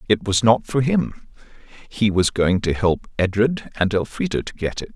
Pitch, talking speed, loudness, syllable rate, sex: 110 Hz, 195 wpm, -20 LUFS, 4.7 syllables/s, male